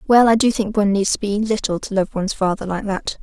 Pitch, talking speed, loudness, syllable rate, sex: 205 Hz, 280 wpm, -19 LUFS, 6.2 syllables/s, female